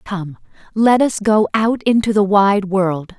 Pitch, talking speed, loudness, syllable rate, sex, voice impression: 205 Hz, 170 wpm, -15 LUFS, 3.8 syllables/s, female, feminine, adult-like, slightly clear, sincere, friendly, slightly kind